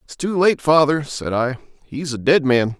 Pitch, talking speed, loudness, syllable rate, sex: 140 Hz, 215 wpm, -18 LUFS, 4.1 syllables/s, male